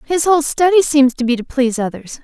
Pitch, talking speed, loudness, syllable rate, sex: 280 Hz, 240 wpm, -15 LUFS, 6.1 syllables/s, female